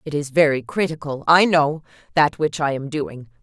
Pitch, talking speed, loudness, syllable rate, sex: 150 Hz, 160 wpm, -19 LUFS, 4.9 syllables/s, female